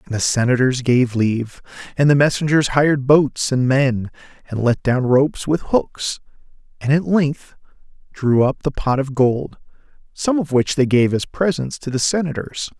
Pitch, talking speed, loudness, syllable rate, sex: 135 Hz, 175 wpm, -18 LUFS, 4.6 syllables/s, male